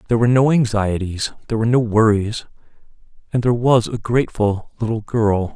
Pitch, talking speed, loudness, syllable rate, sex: 110 Hz, 160 wpm, -18 LUFS, 6.1 syllables/s, male